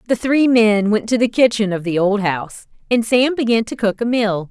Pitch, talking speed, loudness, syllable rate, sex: 220 Hz, 240 wpm, -16 LUFS, 5.1 syllables/s, female